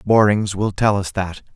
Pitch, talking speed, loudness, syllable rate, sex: 100 Hz, 190 wpm, -19 LUFS, 4.4 syllables/s, male